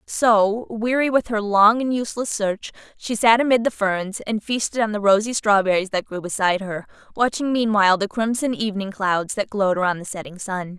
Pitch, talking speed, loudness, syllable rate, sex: 210 Hz, 195 wpm, -20 LUFS, 5.4 syllables/s, female